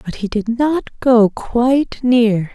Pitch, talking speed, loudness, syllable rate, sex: 235 Hz, 165 wpm, -16 LUFS, 3.5 syllables/s, female